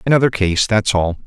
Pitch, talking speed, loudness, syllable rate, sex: 105 Hz, 190 wpm, -16 LUFS, 5.5 syllables/s, male